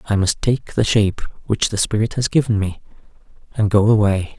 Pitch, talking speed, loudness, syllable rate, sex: 105 Hz, 190 wpm, -18 LUFS, 5.6 syllables/s, male